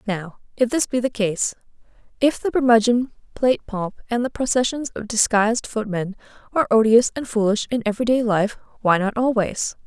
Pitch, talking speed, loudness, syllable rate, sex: 230 Hz, 165 wpm, -21 LUFS, 5.4 syllables/s, female